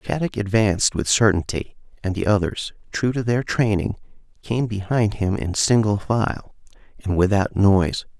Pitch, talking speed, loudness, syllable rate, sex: 105 Hz, 145 wpm, -21 LUFS, 4.7 syllables/s, male